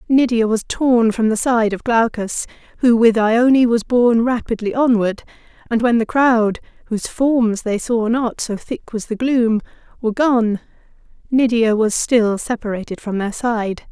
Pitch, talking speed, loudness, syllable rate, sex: 230 Hz, 165 wpm, -17 LUFS, 3.7 syllables/s, female